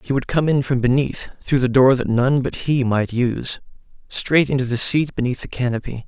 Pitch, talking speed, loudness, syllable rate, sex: 130 Hz, 215 wpm, -19 LUFS, 5.1 syllables/s, male